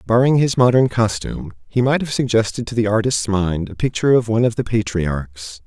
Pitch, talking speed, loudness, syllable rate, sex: 115 Hz, 200 wpm, -18 LUFS, 5.6 syllables/s, male